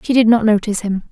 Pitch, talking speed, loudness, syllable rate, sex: 220 Hz, 270 wpm, -15 LUFS, 7.3 syllables/s, female